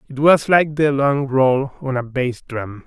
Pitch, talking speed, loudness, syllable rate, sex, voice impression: 135 Hz, 210 wpm, -18 LUFS, 3.9 syllables/s, male, very masculine, very adult-like, old, thick, relaxed, weak, slightly dark, soft, muffled, halting, slightly cool, intellectual, very sincere, very calm, very mature, slightly friendly, slightly reassuring, very unique, elegant, very kind, very modest